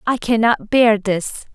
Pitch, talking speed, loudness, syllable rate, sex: 220 Hz, 155 wpm, -16 LUFS, 3.7 syllables/s, female